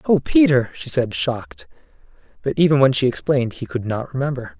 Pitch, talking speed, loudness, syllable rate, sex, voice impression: 130 Hz, 185 wpm, -19 LUFS, 5.7 syllables/s, male, masculine, adult-like, bright, clear, fluent, intellectual, refreshing, slightly calm, friendly, reassuring, unique, lively